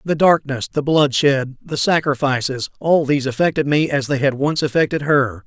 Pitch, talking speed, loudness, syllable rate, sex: 140 Hz, 175 wpm, -18 LUFS, 5.0 syllables/s, male